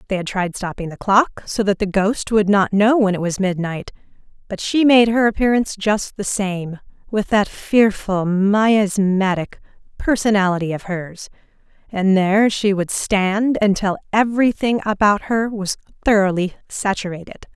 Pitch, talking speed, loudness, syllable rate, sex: 200 Hz, 150 wpm, -18 LUFS, 4.5 syllables/s, female